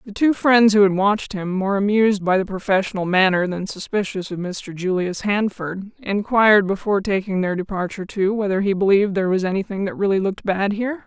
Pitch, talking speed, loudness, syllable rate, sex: 195 Hz, 195 wpm, -20 LUFS, 5.9 syllables/s, female